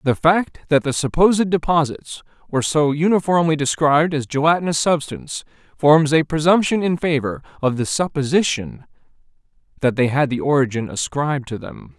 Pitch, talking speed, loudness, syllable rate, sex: 150 Hz, 145 wpm, -18 LUFS, 5.4 syllables/s, male